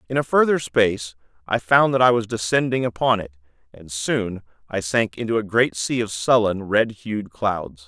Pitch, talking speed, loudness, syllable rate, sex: 105 Hz, 190 wpm, -21 LUFS, 4.7 syllables/s, male